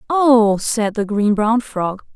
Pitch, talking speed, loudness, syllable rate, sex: 220 Hz, 165 wpm, -17 LUFS, 3.3 syllables/s, female